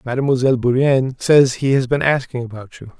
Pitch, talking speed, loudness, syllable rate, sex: 130 Hz, 180 wpm, -16 LUFS, 5.9 syllables/s, male